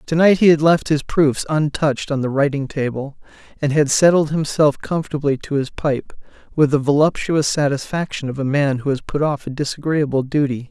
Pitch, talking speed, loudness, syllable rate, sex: 145 Hz, 190 wpm, -18 LUFS, 5.4 syllables/s, male